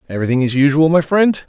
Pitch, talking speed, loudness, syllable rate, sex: 150 Hz, 205 wpm, -14 LUFS, 7.1 syllables/s, male